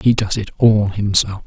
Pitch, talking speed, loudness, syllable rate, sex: 105 Hz, 205 wpm, -16 LUFS, 4.4 syllables/s, male